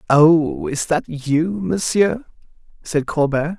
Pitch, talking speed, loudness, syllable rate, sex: 160 Hz, 115 wpm, -18 LUFS, 3.2 syllables/s, male